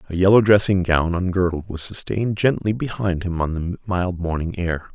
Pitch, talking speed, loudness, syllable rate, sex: 90 Hz, 170 wpm, -20 LUFS, 5.2 syllables/s, male